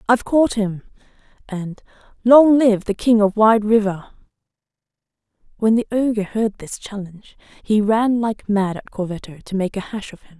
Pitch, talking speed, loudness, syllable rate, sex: 210 Hz, 165 wpm, -18 LUFS, 4.8 syllables/s, female